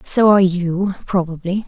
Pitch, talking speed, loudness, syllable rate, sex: 185 Hz, 145 wpm, -17 LUFS, 4.7 syllables/s, female